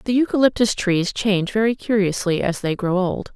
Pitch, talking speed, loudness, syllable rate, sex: 205 Hz, 180 wpm, -20 LUFS, 5.3 syllables/s, female